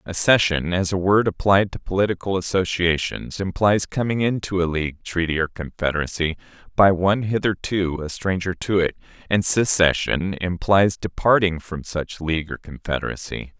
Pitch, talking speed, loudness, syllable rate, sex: 90 Hz, 140 wpm, -21 LUFS, 5.0 syllables/s, male